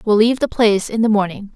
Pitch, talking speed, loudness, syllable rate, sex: 215 Hz, 270 wpm, -16 LUFS, 6.9 syllables/s, female